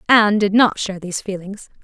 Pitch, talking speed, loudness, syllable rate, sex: 200 Hz, 195 wpm, -17 LUFS, 6.5 syllables/s, female